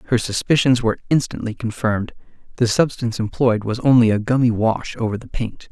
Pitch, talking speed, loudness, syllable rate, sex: 115 Hz, 170 wpm, -19 LUFS, 5.9 syllables/s, male